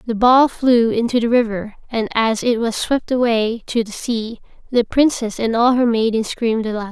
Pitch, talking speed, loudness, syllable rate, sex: 230 Hz, 200 wpm, -17 LUFS, 4.9 syllables/s, female